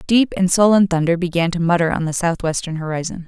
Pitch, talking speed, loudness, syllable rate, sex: 175 Hz, 200 wpm, -18 LUFS, 6.1 syllables/s, female